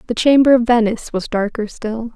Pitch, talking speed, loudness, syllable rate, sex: 230 Hz, 195 wpm, -16 LUFS, 5.6 syllables/s, female